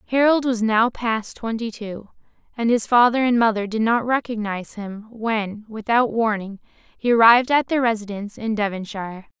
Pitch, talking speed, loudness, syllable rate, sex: 225 Hz, 160 wpm, -20 LUFS, 5.1 syllables/s, female